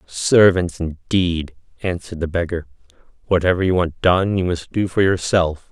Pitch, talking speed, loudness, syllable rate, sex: 90 Hz, 145 wpm, -19 LUFS, 4.7 syllables/s, male